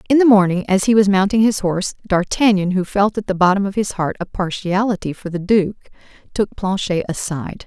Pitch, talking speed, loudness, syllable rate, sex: 195 Hz, 205 wpm, -17 LUFS, 5.7 syllables/s, female